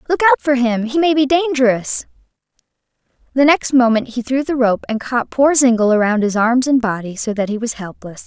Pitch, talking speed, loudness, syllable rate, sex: 250 Hz, 210 wpm, -16 LUFS, 5.4 syllables/s, female